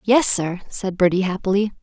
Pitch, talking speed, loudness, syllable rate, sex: 195 Hz, 165 wpm, -19 LUFS, 5.1 syllables/s, female